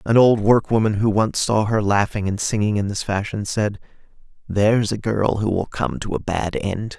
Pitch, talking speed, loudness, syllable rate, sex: 105 Hz, 205 wpm, -20 LUFS, 4.8 syllables/s, male